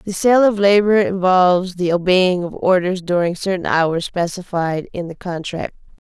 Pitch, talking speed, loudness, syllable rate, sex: 180 Hz, 155 wpm, -17 LUFS, 4.5 syllables/s, female